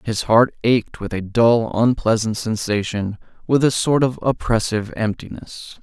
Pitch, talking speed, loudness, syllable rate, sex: 115 Hz, 145 wpm, -19 LUFS, 4.3 syllables/s, male